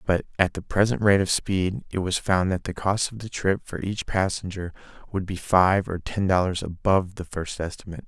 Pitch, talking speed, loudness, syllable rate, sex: 95 Hz, 215 wpm, -24 LUFS, 5.2 syllables/s, male